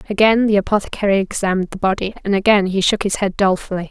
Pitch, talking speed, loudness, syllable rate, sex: 200 Hz, 200 wpm, -17 LUFS, 7.2 syllables/s, female